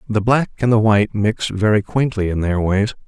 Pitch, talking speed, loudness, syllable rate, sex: 105 Hz, 215 wpm, -17 LUFS, 5.2 syllables/s, male